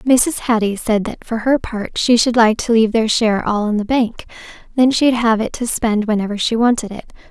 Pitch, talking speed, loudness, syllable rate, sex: 225 Hz, 230 wpm, -16 LUFS, 5.2 syllables/s, female